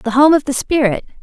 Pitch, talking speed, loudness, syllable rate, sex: 265 Hz, 245 wpm, -14 LUFS, 5.8 syllables/s, female